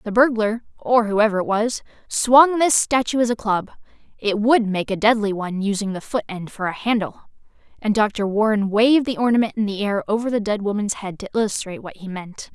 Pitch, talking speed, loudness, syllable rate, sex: 215 Hz, 200 wpm, -20 LUFS, 5.5 syllables/s, female